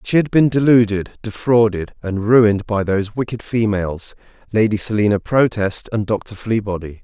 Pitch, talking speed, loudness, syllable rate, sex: 110 Hz, 145 wpm, -17 LUFS, 5.1 syllables/s, male